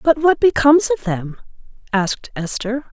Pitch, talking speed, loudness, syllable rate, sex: 255 Hz, 140 wpm, -17 LUFS, 5.1 syllables/s, female